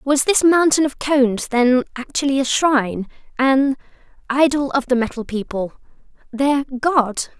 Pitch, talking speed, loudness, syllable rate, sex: 265 Hz, 120 wpm, -18 LUFS, 4.4 syllables/s, female